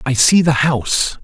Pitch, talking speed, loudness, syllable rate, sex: 140 Hz, 195 wpm, -14 LUFS, 4.7 syllables/s, male